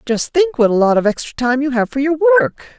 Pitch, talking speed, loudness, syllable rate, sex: 270 Hz, 280 wpm, -15 LUFS, 6.0 syllables/s, female